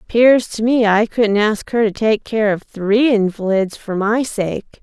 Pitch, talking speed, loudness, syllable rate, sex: 215 Hz, 200 wpm, -16 LUFS, 3.9 syllables/s, female